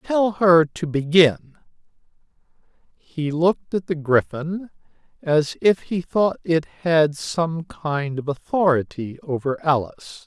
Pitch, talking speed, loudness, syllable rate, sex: 160 Hz, 125 wpm, -21 LUFS, 3.7 syllables/s, male